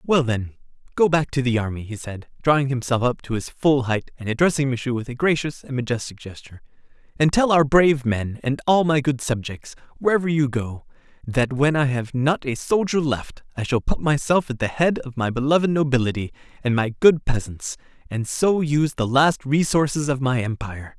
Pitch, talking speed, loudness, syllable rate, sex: 135 Hz, 200 wpm, -21 LUFS, 5.4 syllables/s, male